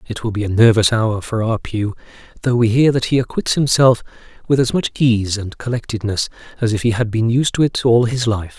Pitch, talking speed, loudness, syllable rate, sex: 115 Hz, 230 wpm, -17 LUFS, 5.5 syllables/s, male